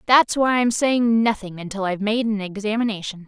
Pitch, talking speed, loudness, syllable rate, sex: 215 Hz, 185 wpm, -21 LUFS, 5.5 syllables/s, female